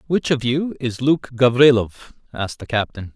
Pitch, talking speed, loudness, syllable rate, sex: 125 Hz, 170 wpm, -19 LUFS, 4.8 syllables/s, male